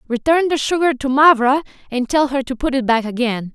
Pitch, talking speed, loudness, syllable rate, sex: 265 Hz, 220 wpm, -17 LUFS, 5.5 syllables/s, female